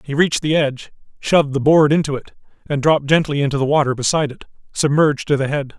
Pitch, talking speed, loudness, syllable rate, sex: 145 Hz, 220 wpm, -17 LUFS, 6.8 syllables/s, male